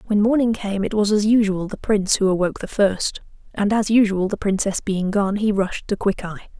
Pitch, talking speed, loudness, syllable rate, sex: 200 Hz, 220 wpm, -20 LUFS, 5.3 syllables/s, female